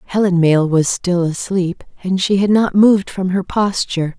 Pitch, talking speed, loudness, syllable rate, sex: 185 Hz, 185 wpm, -16 LUFS, 5.0 syllables/s, female